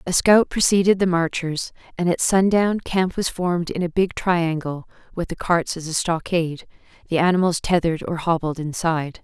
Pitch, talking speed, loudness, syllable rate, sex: 175 Hz, 175 wpm, -21 LUFS, 5.1 syllables/s, female